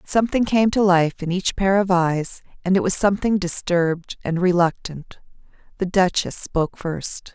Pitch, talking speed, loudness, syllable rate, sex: 180 Hz, 165 wpm, -20 LUFS, 4.7 syllables/s, female